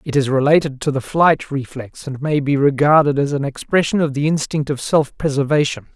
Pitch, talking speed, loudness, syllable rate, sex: 140 Hz, 200 wpm, -17 LUFS, 5.3 syllables/s, male